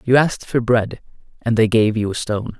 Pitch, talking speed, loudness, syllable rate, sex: 115 Hz, 230 wpm, -18 LUFS, 5.7 syllables/s, male